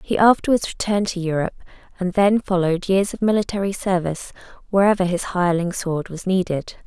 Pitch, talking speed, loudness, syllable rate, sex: 185 Hz, 155 wpm, -20 LUFS, 6.4 syllables/s, female